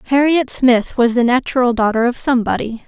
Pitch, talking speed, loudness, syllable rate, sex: 245 Hz, 165 wpm, -15 LUFS, 5.7 syllables/s, female